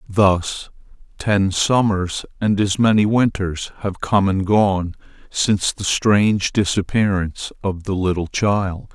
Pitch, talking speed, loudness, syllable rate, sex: 100 Hz, 125 wpm, -19 LUFS, 3.8 syllables/s, male